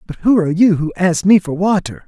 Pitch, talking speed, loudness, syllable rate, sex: 180 Hz, 260 wpm, -14 LUFS, 5.7 syllables/s, male